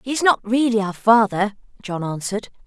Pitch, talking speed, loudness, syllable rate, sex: 215 Hz, 180 wpm, -20 LUFS, 5.5 syllables/s, female